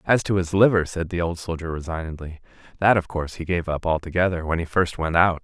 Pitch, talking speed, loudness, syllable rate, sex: 85 Hz, 230 wpm, -23 LUFS, 6.1 syllables/s, male